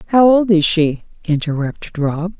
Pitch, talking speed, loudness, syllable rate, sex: 175 Hz, 150 wpm, -16 LUFS, 4.6 syllables/s, female